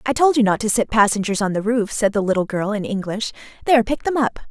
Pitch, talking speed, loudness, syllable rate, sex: 220 Hz, 265 wpm, -19 LUFS, 6.3 syllables/s, female